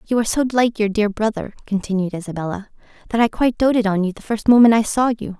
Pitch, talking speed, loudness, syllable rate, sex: 215 Hz, 235 wpm, -18 LUFS, 6.7 syllables/s, female